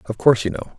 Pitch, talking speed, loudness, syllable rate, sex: 105 Hz, 305 wpm, -19 LUFS, 7.6 syllables/s, male